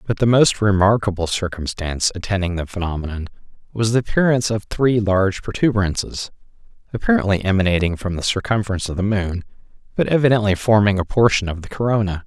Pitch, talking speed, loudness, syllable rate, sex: 100 Hz, 150 wpm, -19 LUFS, 6.4 syllables/s, male